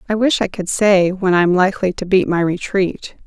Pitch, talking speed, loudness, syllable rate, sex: 190 Hz, 240 wpm, -16 LUFS, 5.3 syllables/s, female